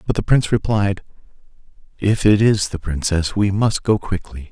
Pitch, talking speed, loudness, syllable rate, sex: 100 Hz, 175 wpm, -18 LUFS, 5.0 syllables/s, male